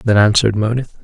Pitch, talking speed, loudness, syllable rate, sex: 110 Hz, 175 wpm, -14 LUFS, 6.6 syllables/s, male